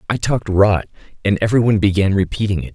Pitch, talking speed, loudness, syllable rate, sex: 105 Hz, 195 wpm, -17 LUFS, 7.2 syllables/s, male